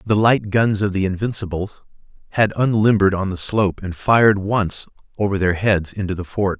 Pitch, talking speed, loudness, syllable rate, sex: 100 Hz, 180 wpm, -19 LUFS, 5.3 syllables/s, male